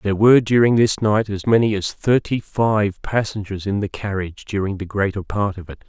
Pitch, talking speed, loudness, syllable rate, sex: 100 Hz, 205 wpm, -19 LUFS, 5.3 syllables/s, male